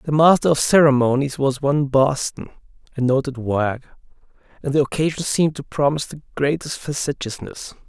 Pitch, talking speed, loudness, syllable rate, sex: 140 Hz, 145 wpm, -19 LUFS, 5.6 syllables/s, male